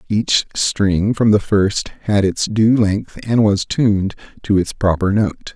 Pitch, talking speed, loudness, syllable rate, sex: 105 Hz, 175 wpm, -17 LUFS, 3.7 syllables/s, male